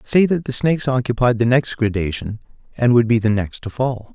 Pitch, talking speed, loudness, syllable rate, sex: 120 Hz, 215 wpm, -18 LUFS, 5.4 syllables/s, male